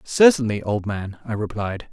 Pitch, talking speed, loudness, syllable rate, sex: 115 Hz, 155 wpm, -21 LUFS, 4.6 syllables/s, male